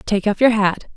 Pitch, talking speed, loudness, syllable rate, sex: 210 Hz, 250 wpm, -17 LUFS, 5.3 syllables/s, female